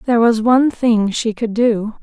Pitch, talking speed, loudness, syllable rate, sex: 225 Hz, 205 wpm, -15 LUFS, 4.9 syllables/s, female